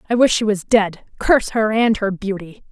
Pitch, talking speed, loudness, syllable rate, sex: 210 Hz, 220 wpm, -18 LUFS, 5.2 syllables/s, female